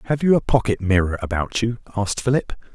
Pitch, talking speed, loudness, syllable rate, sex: 110 Hz, 195 wpm, -21 LUFS, 6.4 syllables/s, male